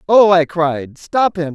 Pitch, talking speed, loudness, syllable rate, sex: 170 Hz, 195 wpm, -15 LUFS, 3.5 syllables/s, male